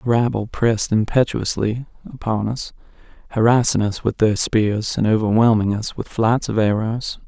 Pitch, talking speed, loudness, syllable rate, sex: 110 Hz, 150 wpm, -19 LUFS, 4.8 syllables/s, male